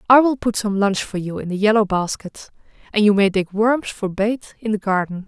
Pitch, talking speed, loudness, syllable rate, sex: 210 Hz, 240 wpm, -19 LUFS, 5.2 syllables/s, female